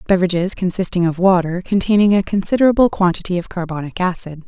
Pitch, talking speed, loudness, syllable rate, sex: 185 Hz, 150 wpm, -17 LUFS, 6.6 syllables/s, female